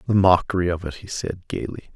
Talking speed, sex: 215 wpm, male